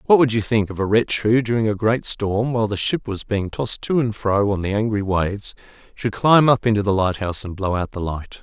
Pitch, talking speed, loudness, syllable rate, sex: 110 Hz, 265 wpm, -20 LUFS, 5.6 syllables/s, male